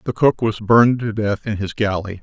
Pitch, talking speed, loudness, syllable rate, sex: 110 Hz, 245 wpm, -18 LUFS, 5.4 syllables/s, male